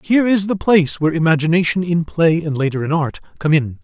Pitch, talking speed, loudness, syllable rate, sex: 165 Hz, 220 wpm, -17 LUFS, 6.2 syllables/s, male